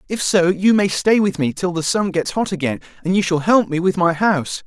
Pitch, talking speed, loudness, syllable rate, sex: 185 Hz, 270 wpm, -18 LUFS, 5.4 syllables/s, male